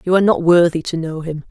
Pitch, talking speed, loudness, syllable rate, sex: 170 Hz, 280 wpm, -16 LUFS, 6.5 syllables/s, female